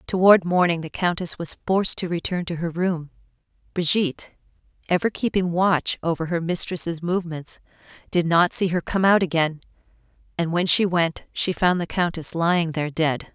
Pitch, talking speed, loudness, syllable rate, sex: 170 Hz, 165 wpm, -22 LUFS, 5.1 syllables/s, female